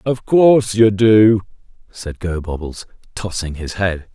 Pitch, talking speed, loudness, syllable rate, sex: 100 Hz, 130 wpm, -16 LUFS, 4.0 syllables/s, male